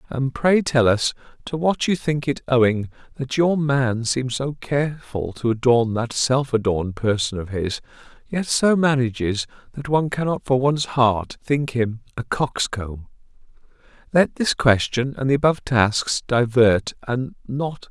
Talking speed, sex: 170 wpm, male